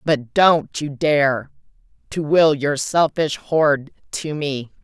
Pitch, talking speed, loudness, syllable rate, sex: 145 Hz, 135 wpm, -19 LUFS, 3.1 syllables/s, female